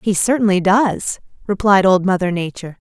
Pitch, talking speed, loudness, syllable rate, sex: 195 Hz, 145 wpm, -16 LUFS, 5.3 syllables/s, female